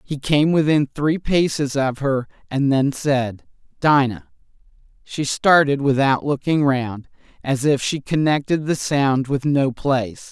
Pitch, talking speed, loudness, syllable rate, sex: 140 Hz, 145 wpm, -19 LUFS, 4.0 syllables/s, female